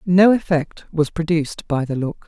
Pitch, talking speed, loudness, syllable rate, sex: 165 Hz, 185 wpm, -19 LUFS, 4.6 syllables/s, female